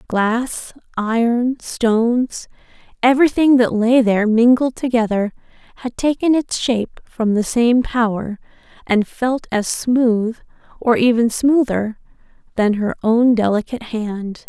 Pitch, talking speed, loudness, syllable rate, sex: 235 Hz, 120 wpm, -17 LUFS, 4.1 syllables/s, female